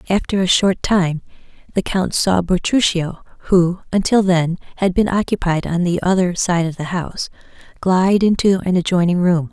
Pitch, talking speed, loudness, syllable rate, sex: 180 Hz, 165 wpm, -17 LUFS, 5.0 syllables/s, female